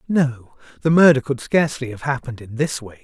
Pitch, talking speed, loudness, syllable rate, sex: 135 Hz, 200 wpm, -19 LUFS, 5.8 syllables/s, male